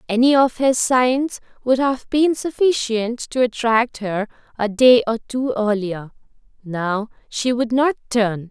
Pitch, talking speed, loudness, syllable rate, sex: 240 Hz, 150 wpm, -19 LUFS, 3.8 syllables/s, female